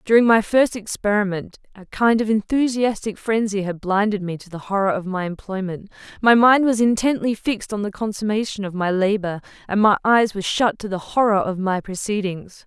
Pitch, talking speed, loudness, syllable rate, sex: 205 Hz, 190 wpm, -20 LUFS, 5.4 syllables/s, female